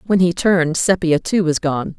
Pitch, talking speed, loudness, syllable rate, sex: 170 Hz, 210 wpm, -17 LUFS, 4.8 syllables/s, female